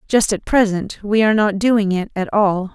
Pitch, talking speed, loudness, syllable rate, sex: 205 Hz, 220 wpm, -17 LUFS, 4.7 syllables/s, female